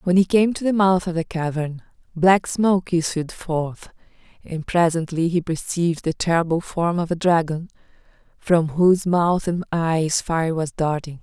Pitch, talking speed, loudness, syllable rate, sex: 170 Hz, 165 wpm, -21 LUFS, 4.5 syllables/s, female